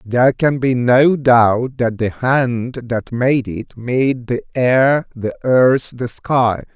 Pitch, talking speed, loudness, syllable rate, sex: 125 Hz, 160 wpm, -16 LUFS, 3.0 syllables/s, male